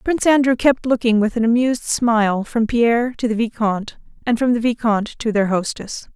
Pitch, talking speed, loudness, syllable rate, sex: 230 Hz, 195 wpm, -18 LUFS, 5.6 syllables/s, female